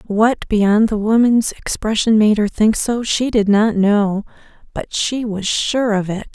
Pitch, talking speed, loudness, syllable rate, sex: 215 Hz, 180 wpm, -16 LUFS, 3.9 syllables/s, female